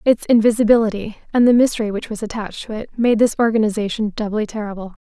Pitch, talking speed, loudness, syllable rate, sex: 220 Hz, 180 wpm, -18 LUFS, 6.7 syllables/s, female